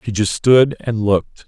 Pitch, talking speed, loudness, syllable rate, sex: 110 Hz, 205 wpm, -16 LUFS, 4.4 syllables/s, male